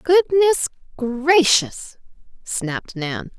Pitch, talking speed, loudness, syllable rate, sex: 265 Hz, 70 wpm, -19 LUFS, 2.5 syllables/s, female